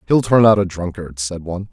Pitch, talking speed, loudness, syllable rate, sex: 95 Hz, 245 wpm, -17 LUFS, 5.8 syllables/s, male